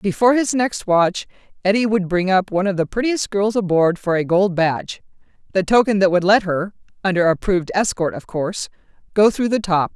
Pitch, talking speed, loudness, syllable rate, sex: 195 Hz, 185 wpm, -18 LUFS, 5.5 syllables/s, female